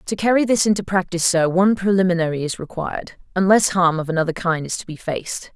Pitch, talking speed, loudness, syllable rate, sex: 180 Hz, 195 wpm, -19 LUFS, 6.4 syllables/s, female